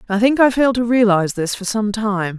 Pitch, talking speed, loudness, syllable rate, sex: 215 Hz, 250 wpm, -17 LUFS, 5.9 syllables/s, female